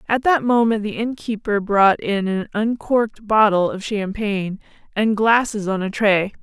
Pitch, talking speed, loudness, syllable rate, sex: 210 Hz, 160 wpm, -19 LUFS, 4.5 syllables/s, female